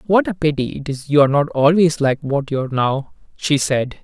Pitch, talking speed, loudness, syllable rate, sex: 145 Hz, 240 wpm, -18 LUFS, 5.5 syllables/s, male